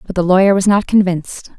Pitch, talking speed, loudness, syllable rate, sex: 190 Hz, 230 wpm, -13 LUFS, 6.3 syllables/s, female